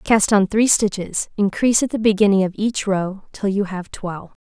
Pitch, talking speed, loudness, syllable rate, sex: 200 Hz, 205 wpm, -19 LUFS, 5.1 syllables/s, female